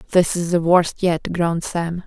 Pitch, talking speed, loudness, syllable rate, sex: 170 Hz, 205 wpm, -19 LUFS, 4.5 syllables/s, female